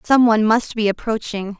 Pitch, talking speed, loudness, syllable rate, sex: 220 Hz, 190 wpm, -18 LUFS, 5.4 syllables/s, female